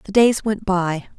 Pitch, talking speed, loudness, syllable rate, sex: 200 Hz, 205 wpm, -19 LUFS, 4.0 syllables/s, female